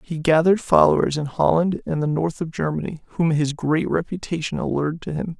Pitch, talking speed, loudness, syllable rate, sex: 160 Hz, 190 wpm, -21 LUFS, 5.7 syllables/s, male